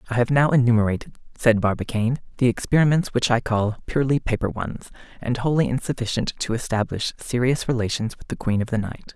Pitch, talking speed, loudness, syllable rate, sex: 120 Hz, 175 wpm, -22 LUFS, 6.0 syllables/s, male